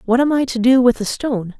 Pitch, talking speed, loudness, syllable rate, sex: 245 Hz, 300 wpm, -16 LUFS, 6.2 syllables/s, female